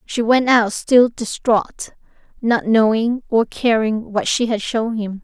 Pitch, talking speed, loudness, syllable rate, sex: 225 Hz, 160 wpm, -17 LUFS, 3.7 syllables/s, female